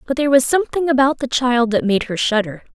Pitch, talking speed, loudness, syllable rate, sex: 255 Hz, 240 wpm, -17 LUFS, 6.4 syllables/s, female